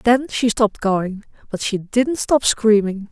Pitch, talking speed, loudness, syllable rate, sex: 220 Hz, 175 wpm, -18 LUFS, 3.9 syllables/s, female